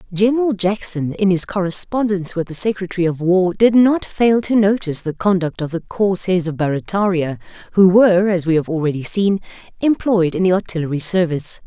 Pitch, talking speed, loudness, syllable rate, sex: 185 Hz, 175 wpm, -17 LUFS, 5.7 syllables/s, female